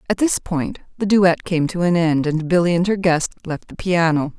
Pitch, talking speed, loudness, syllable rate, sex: 170 Hz, 235 wpm, -19 LUFS, 4.9 syllables/s, female